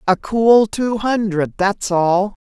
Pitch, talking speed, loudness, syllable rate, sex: 205 Hz, 145 wpm, -16 LUFS, 3.2 syllables/s, female